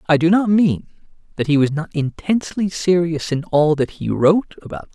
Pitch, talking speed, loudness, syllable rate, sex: 165 Hz, 220 wpm, -18 LUFS, 5.7 syllables/s, male